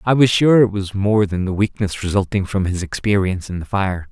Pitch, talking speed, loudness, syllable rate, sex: 100 Hz, 235 wpm, -18 LUFS, 5.5 syllables/s, male